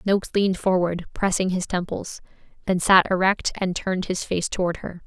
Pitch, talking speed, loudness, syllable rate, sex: 185 Hz, 180 wpm, -23 LUFS, 5.4 syllables/s, female